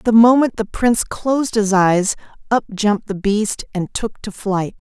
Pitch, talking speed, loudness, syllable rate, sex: 210 Hz, 195 wpm, -18 LUFS, 4.8 syllables/s, female